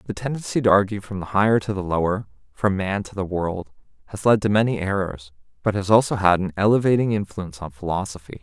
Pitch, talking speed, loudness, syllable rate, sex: 100 Hz, 205 wpm, -22 LUFS, 6.2 syllables/s, male